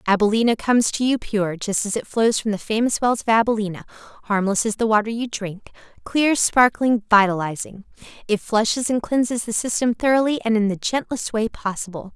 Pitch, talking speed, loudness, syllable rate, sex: 220 Hz, 170 wpm, -20 LUFS, 5.5 syllables/s, female